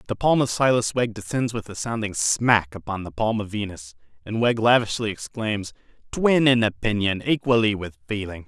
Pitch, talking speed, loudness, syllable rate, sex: 110 Hz, 175 wpm, -22 LUFS, 5.1 syllables/s, male